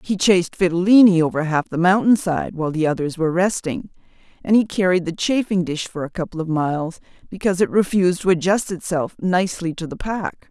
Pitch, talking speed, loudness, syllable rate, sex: 180 Hz, 190 wpm, -19 LUFS, 6.0 syllables/s, female